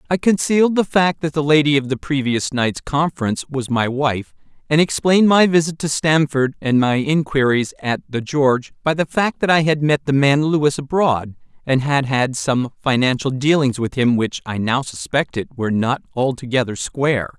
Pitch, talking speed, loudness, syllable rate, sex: 140 Hz, 185 wpm, -18 LUFS, 5.0 syllables/s, male